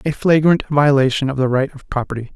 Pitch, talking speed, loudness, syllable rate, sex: 140 Hz, 205 wpm, -17 LUFS, 5.9 syllables/s, male